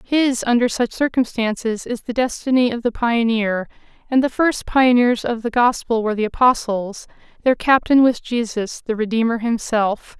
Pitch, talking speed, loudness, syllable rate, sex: 235 Hz, 155 wpm, -19 LUFS, 4.8 syllables/s, female